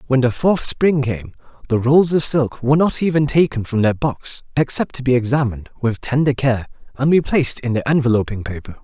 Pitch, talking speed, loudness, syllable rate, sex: 130 Hz, 195 wpm, -18 LUFS, 5.5 syllables/s, male